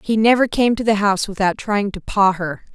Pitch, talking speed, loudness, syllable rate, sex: 205 Hz, 240 wpm, -18 LUFS, 5.5 syllables/s, female